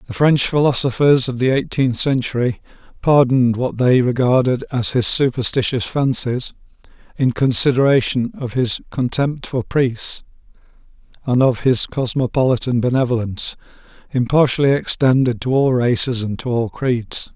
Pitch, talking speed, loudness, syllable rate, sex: 125 Hz, 125 wpm, -17 LUFS, 4.8 syllables/s, male